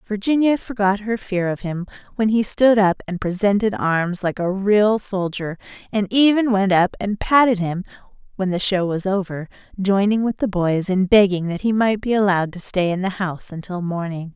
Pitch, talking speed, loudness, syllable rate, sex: 195 Hz, 195 wpm, -19 LUFS, 5.0 syllables/s, female